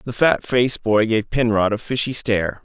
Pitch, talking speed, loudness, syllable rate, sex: 115 Hz, 205 wpm, -19 LUFS, 5.2 syllables/s, male